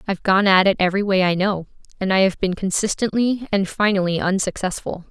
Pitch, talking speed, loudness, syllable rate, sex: 195 Hz, 190 wpm, -19 LUFS, 6.0 syllables/s, female